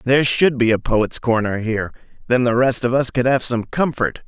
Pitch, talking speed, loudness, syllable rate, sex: 120 Hz, 225 wpm, -18 LUFS, 5.3 syllables/s, male